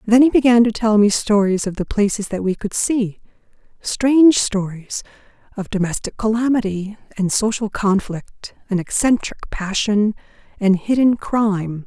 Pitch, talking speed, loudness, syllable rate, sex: 210 Hz, 135 wpm, -18 LUFS, 4.6 syllables/s, female